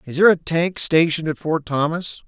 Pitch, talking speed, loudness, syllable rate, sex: 160 Hz, 210 wpm, -19 LUFS, 5.6 syllables/s, male